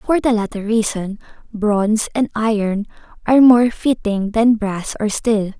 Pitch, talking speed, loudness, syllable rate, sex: 215 Hz, 150 wpm, -17 LUFS, 4.3 syllables/s, female